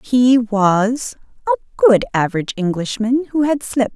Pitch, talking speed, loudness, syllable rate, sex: 235 Hz, 135 wpm, -17 LUFS, 4.9 syllables/s, female